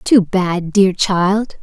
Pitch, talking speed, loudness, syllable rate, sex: 195 Hz, 150 wpm, -15 LUFS, 2.6 syllables/s, female